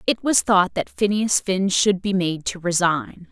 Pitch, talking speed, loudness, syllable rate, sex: 190 Hz, 200 wpm, -20 LUFS, 4.1 syllables/s, female